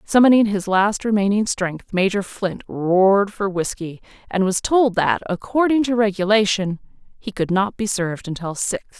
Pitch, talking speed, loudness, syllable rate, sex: 200 Hz, 160 wpm, -19 LUFS, 4.7 syllables/s, female